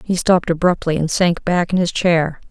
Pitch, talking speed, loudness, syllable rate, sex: 175 Hz, 215 wpm, -17 LUFS, 5.2 syllables/s, female